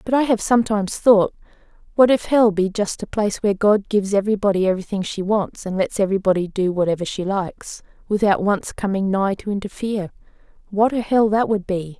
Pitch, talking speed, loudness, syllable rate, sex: 200 Hz, 190 wpm, -20 LUFS, 6.1 syllables/s, female